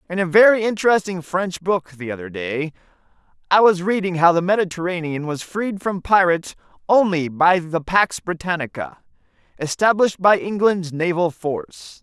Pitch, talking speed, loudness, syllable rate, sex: 175 Hz, 145 wpm, -19 LUFS, 5.0 syllables/s, male